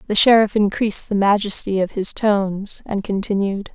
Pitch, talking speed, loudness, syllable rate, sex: 205 Hz, 160 wpm, -18 LUFS, 5.1 syllables/s, female